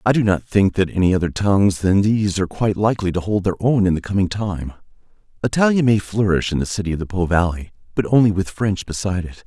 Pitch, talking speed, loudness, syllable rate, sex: 100 Hz, 235 wpm, -19 LUFS, 6.4 syllables/s, male